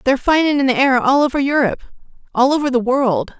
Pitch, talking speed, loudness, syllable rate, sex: 265 Hz, 195 wpm, -16 LUFS, 6.6 syllables/s, female